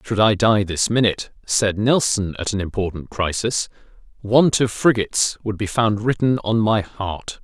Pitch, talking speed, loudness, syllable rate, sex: 105 Hz, 170 wpm, -19 LUFS, 4.6 syllables/s, male